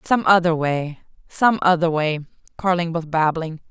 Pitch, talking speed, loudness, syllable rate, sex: 170 Hz, 130 wpm, -20 LUFS, 4.5 syllables/s, female